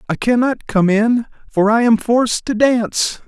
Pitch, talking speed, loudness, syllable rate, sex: 230 Hz, 185 wpm, -16 LUFS, 4.6 syllables/s, male